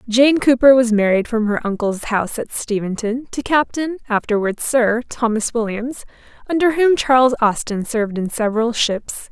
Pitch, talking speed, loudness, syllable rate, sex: 235 Hz, 155 wpm, -17 LUFS, 4.9 syllables/s, female